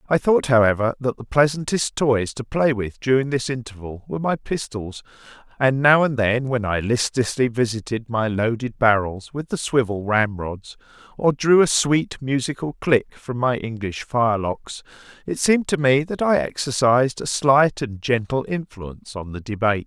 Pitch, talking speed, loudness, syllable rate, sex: 125 Hz, 170 wpm, -21 LUFS, 4.8 syllables/s, male